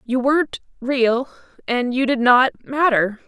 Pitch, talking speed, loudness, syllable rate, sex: 255 Hz, 90 wpm, -18 LUFS, 4.2 syllables/s, female